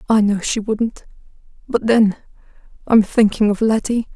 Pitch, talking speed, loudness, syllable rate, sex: 215 Hz, 145 wpm, -17 LUFS, 4.6 syllables/s, female